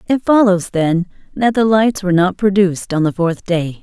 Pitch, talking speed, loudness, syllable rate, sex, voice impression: 190 Hz, 205 wpm, -15 LUFS, 5.0 syllables/s, female, feminine, adult-like, slightly bright, soft, fluent, calm, friendly, reassuring, elegant, kind, slightly modest